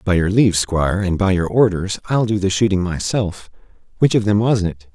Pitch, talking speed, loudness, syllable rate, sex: 100 Hz, 220 wpm, -18 LUFS, 5.4 syllables/s, male